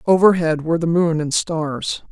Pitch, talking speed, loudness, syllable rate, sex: 165 Hz, 170 wpm, -18 LUFS, 4.7 syllables/s, female